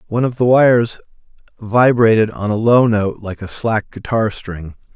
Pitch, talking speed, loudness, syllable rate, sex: 110 Hz, 170 wpm, -15 LUFS, 4.8 syllables/s, male